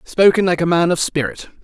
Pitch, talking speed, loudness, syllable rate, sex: 175 Hz, 220 wpm, -16 LUFS, 5.7 syllables/s, male